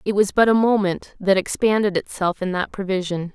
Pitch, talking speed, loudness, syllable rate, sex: 195 Hz, 195 wpm, -20 LUFS, 5.3 syllables/s, female